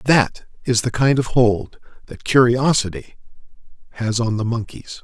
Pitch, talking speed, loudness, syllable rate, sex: 120 Hz, 145 wpm, -18 LUFS, 4.7 syllables/s, male